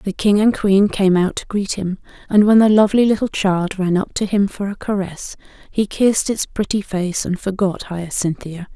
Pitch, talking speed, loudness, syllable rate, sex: 195 Hz, 205 wpm, -18 LUFS, 5.0 syllables/s, female